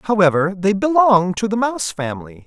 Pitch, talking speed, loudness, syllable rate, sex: 195 Hz, 170 wpm, -17 LUFS, 5.4 syllables/s, male